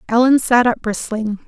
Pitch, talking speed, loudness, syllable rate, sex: 230 Hz, 160 wpm, -16 LUFS, 4.8 syllables/s, female